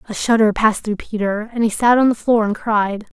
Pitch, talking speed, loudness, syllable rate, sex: 220 Hz, 245 wpm, -17 LUFS, 5.6 syllables/s, female